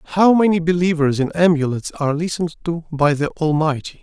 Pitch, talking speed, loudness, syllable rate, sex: 160 Hz, 165 wpm, -18 LUFS, 6.0 syllables/s, male